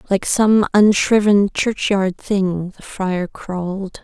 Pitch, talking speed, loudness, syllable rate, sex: 195 Hz, 120 wpm, -17 LUFS, 3.3 syllables/s, female